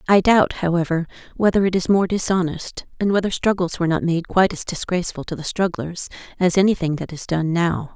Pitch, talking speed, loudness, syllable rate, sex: 175 Hz, 195 wpm, -20 LUFS, 5.8 syllables/s, female